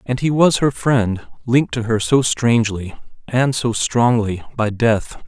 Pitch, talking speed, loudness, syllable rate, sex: 120 Hz, 170 wpm, -17 LUFS, 4.2 syllables/s, male